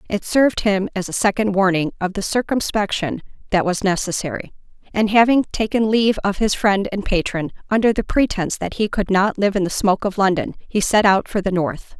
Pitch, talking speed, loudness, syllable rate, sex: 200 Hz, 205 wpm, -19 LUFS, 5.6 syllables/s, female